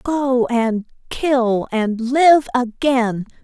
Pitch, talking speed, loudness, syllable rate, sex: 245 Hz, 105 wpm, -17 LUFS, 2.4 syllables/s, female